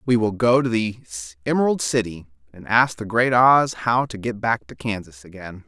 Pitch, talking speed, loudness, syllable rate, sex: 110 Hz, 200 wpm, -20 LUFS, 4.9 syllables/s, male